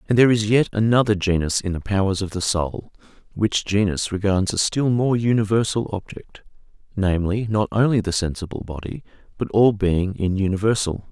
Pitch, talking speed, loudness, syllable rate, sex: 100 Hz, 160 wpm, -21 LUFS, 5.4 syllables/s, male